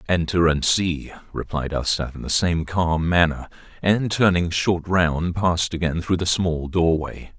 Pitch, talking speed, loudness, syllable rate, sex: 85 Hz, 165 wpm, -21 LUFS, 4.2 syllables/s, male